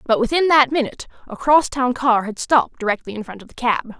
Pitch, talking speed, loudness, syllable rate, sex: 245 Hz, 225 wpm, -18 LUFS, 6.0 syllables/s, female